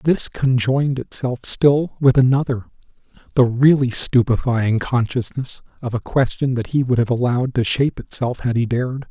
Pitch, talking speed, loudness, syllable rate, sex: 125 Hz, 160 wpm, -18 LUFS, 4.9 syllables/s, male